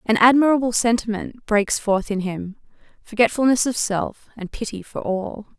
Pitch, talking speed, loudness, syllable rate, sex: 220 Hz, 150 wpm, -20 LUFS, 4.7 syllables/s, female